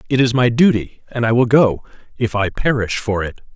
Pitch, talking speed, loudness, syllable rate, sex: 115 Hz, 200 wpm, -17 LUFS, 5.3 syllables/s, male